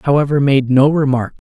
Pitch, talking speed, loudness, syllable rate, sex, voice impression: 140 Hz, 200 wpm, -14 LUFS, 5.9 syllables/s, male, masculine, adult-like, relaxed, slightly weak, slightly dark, raspy, calm, friendly, reassuring, slightly wild, kind, modest